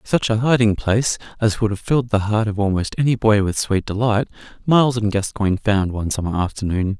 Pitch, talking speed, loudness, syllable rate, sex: 110 Hz, 205 wpm, -19 LUFS, 5.9 syllables/s, male